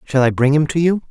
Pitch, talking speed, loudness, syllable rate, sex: 145 Hz, 325 wpm, -16 LUFS, 6.3 syllables/s, male